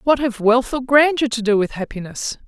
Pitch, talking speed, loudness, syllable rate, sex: 245 Hz, 220 wpm, -18 LUFS, 5.2 syllables/s, female